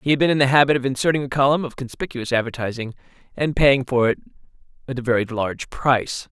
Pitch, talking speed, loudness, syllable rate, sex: 130 Hz, 195 wpm, -20 LUFS, 6.5 syllables/s, male